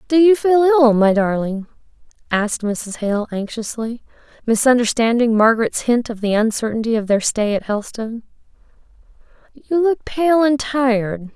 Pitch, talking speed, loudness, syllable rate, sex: 235 Hz, 135 wpm, -17 LUFS, 4.8 syllables/s, female